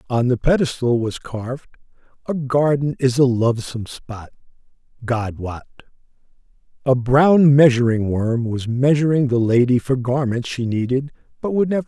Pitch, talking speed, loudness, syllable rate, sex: 130 Hz, 145 wpm, -18 LUFS, 5.0 syllables/s, male